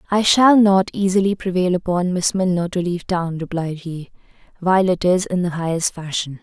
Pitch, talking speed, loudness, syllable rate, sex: 180 Hz, 185 wpm, -18 LUFS, 5.3 syllables/s, female